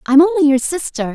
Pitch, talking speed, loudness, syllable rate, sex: 295 Hz, 210 wpm, -15 LUFS, 5.8 syllables/s, female